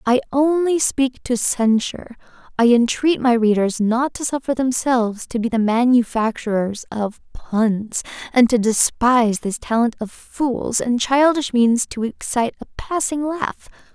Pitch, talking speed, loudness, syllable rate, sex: 245 Hz, 145 wpm, -19 LUFS, 4.3 syllables/s, female